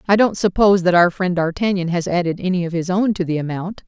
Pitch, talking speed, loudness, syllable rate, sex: 180 Hz, 250 wpm, -18 LUFS, 6.2 syllables/s, female